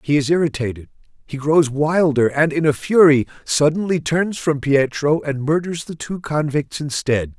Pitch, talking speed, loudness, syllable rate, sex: 150 Hz, 160 wpm, -18 LUFS, 4.6 syllables/s, male